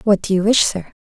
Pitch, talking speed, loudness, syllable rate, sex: 200 Hz, 290 wpm, -16 LUFS, 6.0 syllables/s, female